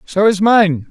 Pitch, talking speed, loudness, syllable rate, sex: 195 Hz, 200 wpm, -13 LUFS, 3.7 syllables/s, male